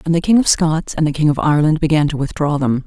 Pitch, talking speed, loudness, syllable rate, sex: 155 Hz, 295 wpm, -16 LUFS, 6.5 syllables/s, female